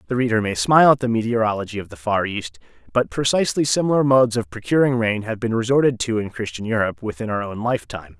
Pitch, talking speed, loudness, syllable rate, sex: 115 Hz, 210 wpm, -20 LUFS, 6.8 syllables/s, male